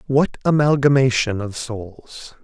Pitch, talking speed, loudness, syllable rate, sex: 125 Hz, 100 wpm, -18 LUFS, 3.7 syllables/s, male